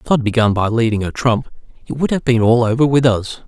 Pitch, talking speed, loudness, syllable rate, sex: 120 Hz, 260 wpm, -16 LUFS, 6.1 syllables/s, male